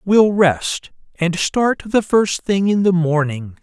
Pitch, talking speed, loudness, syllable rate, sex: 180 Hz, 165 wpm, -17 LUFS, 3.3 syllables/s, male